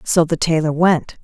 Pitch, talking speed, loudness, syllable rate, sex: 165 Hz, 195 wpm, -16 LUFS, 4.5 syllables/s, female